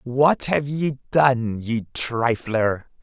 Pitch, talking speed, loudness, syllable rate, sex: 125 Hz, 120 wpm, -21 LUFS, 2.8 syllables/s, male